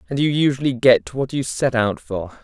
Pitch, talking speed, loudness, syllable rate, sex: 125 Hz, 220 wpm, -19 LUFS, 4.9 syllables/s, male